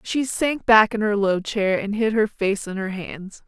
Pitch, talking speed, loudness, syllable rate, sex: 205 Hz, 240 wpm, -21 LUFS, 4.2 syllables/s, female